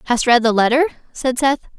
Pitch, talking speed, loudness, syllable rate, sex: 250 Hz, 200 wpm, -16 LUFS, 6.1 syllables/s, female